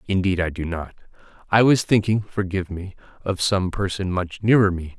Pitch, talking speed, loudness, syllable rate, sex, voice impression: 95 Hz, 155 wpm, -21 LUFS, 5.3 syllables/s, male, masculine, very adult-like, middle-aged, thick, tensed, slightly powerful, slightly bright, hard, clear, fluent, cool, slightly intellectual, slightly refreshing, sincere, very calm, friendly, slightly reassuring, elegant, slightly wild, slightly lively, kind, slightly modest